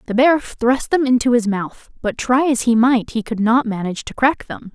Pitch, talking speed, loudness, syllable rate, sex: 240 Hz, 240 wpm, -17 LUFS, 4.9 syllables/s, female